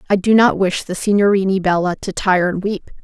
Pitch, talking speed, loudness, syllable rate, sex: 190 Hz, 220 wpm, -16 LUFS, 5.6 syllables/s, female